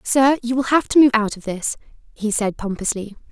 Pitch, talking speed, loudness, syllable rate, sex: 230 Hz, 215 wpm, -19 LUFS, 5.4 syllables/s, female